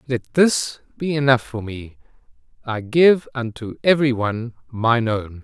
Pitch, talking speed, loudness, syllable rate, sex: 125 Hz, 145 wpm, -20 LUFS, 4.3 syllables/s, male